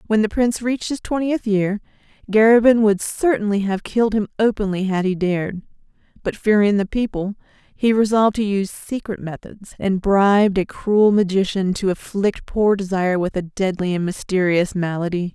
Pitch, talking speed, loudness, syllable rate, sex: 200 Hz, 165 wpm, -19 LUFS, 5.3 syllables/s, female